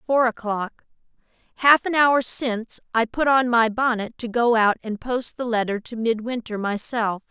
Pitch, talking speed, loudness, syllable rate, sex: 235 Hz, 165 wpm, -22 LUFS, 4.6 syllables/s, female